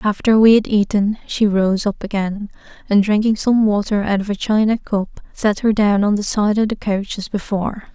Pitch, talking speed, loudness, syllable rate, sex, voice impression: 205 Hz, 210 wpm, -17 LUFS, 5.0 syllables/s, female, feminine, adult-like, tensed, slightly bright, clear, fluent, intellectual, calm, reassuring, elegant, modest